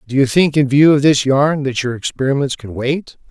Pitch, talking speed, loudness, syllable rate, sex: 140 Hz, 235 wpm, -15 LUFS, 5.2 syllables/s, male